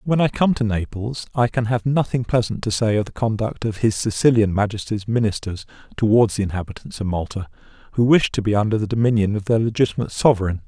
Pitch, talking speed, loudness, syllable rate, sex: 110 Hz, 200 wpm, -20 LUFS, 6.2 syllables/s, male